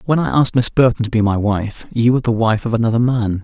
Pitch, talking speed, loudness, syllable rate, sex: 115 Hz, 280 wpm, -16 LUFS, 6.5 syllables/s, male